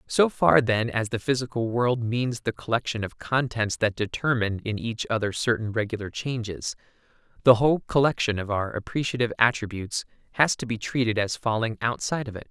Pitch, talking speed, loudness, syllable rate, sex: 115 Hz, 175 wpm, -25 LUFS, 5.6 syllables/s, male